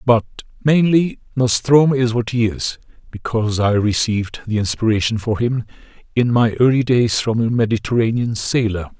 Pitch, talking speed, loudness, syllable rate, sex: 115 Hz, 145 wpm, -17 LUFS, 5.1 syllables/s, male